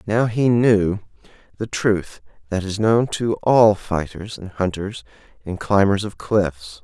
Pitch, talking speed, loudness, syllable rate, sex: 100 Hz, 150 wpm, -20 LUFS, 3.7 syllables/s, male